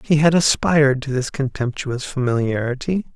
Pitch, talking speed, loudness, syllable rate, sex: 135 Hz, 135 wpm, -19 LUFS, 5.0 syllables/s, male